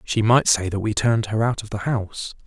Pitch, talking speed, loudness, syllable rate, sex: 110 Hz, 270 wpm, -21 LUFS, 5.7 syllables/s, male